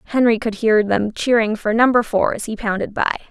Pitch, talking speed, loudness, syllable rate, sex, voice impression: 220 Hz, 220 wpm, -18 LUFS, 5.4 syllables/s, female, slightly feminine, slightly young, slightly bright, clear, slightly cute, refreshing, slightly lively